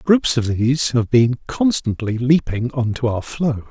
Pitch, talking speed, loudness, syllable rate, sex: 125 Hz, 180 wpm, -18 LUFS, 4.3 syllables/s, male